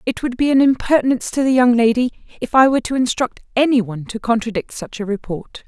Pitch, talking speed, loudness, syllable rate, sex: 240 Hz, 220 wpm, -17 LUFS, 6.4 syllables/s, female